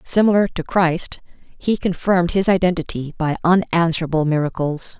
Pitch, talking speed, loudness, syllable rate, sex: 170 Hz, 120 wpm, -19 LUFS, 5.0 syllables/s, female